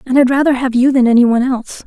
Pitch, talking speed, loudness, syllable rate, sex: 255 Hz, 290 wpm, -13 LUFS, 7.4 syllables/s, female